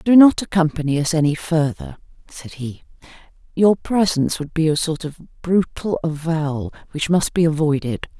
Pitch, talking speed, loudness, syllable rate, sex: 160 Hz, 155 wpm, -19 LUFS, 5.0 syllables/s, female